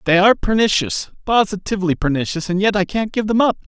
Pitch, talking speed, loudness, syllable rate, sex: 195 Hz, 190 wpm, -18 LUFS, 6.3 syllables/s, male